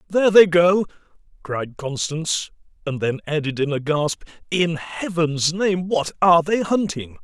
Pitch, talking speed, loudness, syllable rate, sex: 165 Hz, 150 wpm, -20 LUFS, 4.4 syllables/s, male